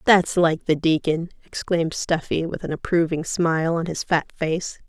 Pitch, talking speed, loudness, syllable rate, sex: 165 Hz, 170 wpm, -22 LUFS, 4.7 syllables/s, female